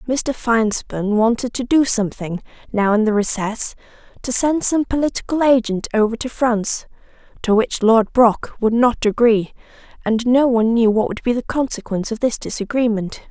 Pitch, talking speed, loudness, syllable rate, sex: 230 Hz, 160 wpm, -18 LUFS, 5.1 syllables/s, female